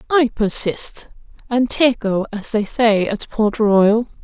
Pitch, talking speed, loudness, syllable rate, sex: 220 Hz, 115 wpm, -17 LUFS, 3.6 syllables/s, female